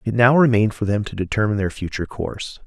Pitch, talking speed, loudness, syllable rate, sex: 110 Hz, 225 wpm, -20 LUFS, 7.1 syllables/s, male